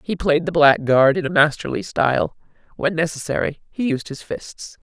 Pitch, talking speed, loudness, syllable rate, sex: 155 Hz, 170 wpm, -19 LUFS, 5.0 syllables/s, female